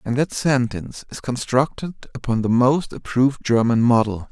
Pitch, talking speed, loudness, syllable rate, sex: 125 Hz, 155 wpm, -20 LUFS, 4.9 syllables/s, male